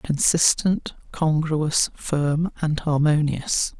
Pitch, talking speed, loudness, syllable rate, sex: 155 Hz, 80 wpm, -21 LUFS, 2.9 syllables/s, male